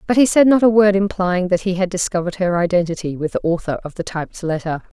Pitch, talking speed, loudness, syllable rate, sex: 185 Hz, 240 wpm, -18 LUFS, 6.5 syllables/s, female